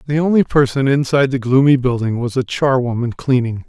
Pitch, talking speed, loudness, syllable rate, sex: 130 Hz, 180 wpm, -16 LUFS, 5.7 syllables/s, male